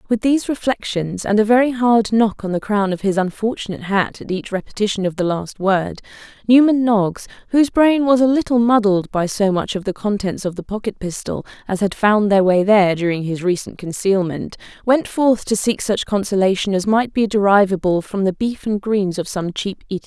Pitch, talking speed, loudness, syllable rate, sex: 205 Hz, 210 wpm, -18 LUFS, 5.4 syllables/s, female